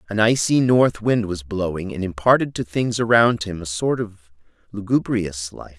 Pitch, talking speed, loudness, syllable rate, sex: 105 Hz, 175 wpm, -20 LUFS, 4.6 syllables/s, male